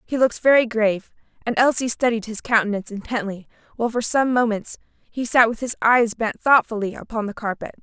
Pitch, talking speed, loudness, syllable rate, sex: 230 Hz, 185 wpm, -20 LUFS, 5.9 syllables/s, female